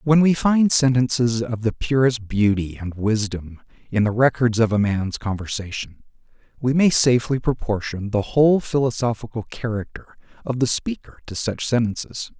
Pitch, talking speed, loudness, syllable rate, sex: 120 Hz, 150 wpm, -21 LUFS, 4.9 syllables/s, male